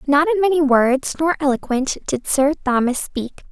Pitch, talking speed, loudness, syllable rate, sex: 285 Hz, 170 wpm, -18 LUFS, 4.6 syllables/s, female